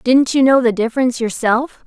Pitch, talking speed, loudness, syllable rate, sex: 250 Hz, 195 wpm, -15 LUFS, 5.5 syllables/s, female